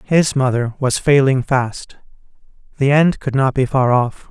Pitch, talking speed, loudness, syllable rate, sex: 130 Hz, 165 wpm, -16 LUFS, 4.1 syllables/s, male